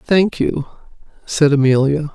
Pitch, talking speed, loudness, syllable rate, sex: 150 Hz, 110 wpm, -16 LUFS, 4.1 syllables/s, female